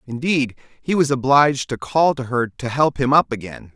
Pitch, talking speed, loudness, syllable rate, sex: 130 Hz, 210 wpm, -19 LUFS, 4.9 syllables/s, male